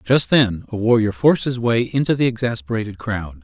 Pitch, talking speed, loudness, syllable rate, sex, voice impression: 115 Hz, 190 wpm, -19 LUFS, 5.5 syllables/s, male, masculine, adult-like, slightly cool, slightly intellectual, sincere, calm, slightly elegant